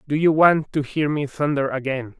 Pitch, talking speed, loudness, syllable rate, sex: 145 Hz, 220 wpm, -20 LUFS, 5.0 syllables/s, male